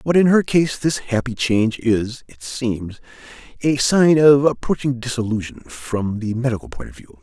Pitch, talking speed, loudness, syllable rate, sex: 125 Hz, 175 wpm, -19 LUFS, 4.6 syllables/s, male